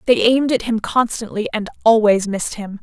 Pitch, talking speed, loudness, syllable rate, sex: 220 Hz, 190 wpm, -17 LUFS, 5.7 syllables/s, female